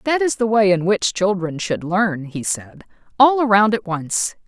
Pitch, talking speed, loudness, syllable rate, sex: 200 Hz, 200 wpm, -18 LUFS, 4.3 syllables/s, female